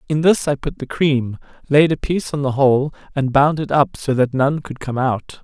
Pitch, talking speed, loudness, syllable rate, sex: 140 Hz, 245 wpm, -18 LUFS, 4.9 syllables/s, male